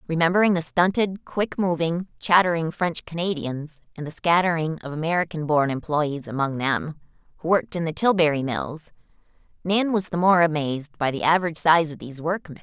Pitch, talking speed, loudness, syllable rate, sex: 165 Hz, 165 wpm, -23 LUFS, 5.6 syllables/s, female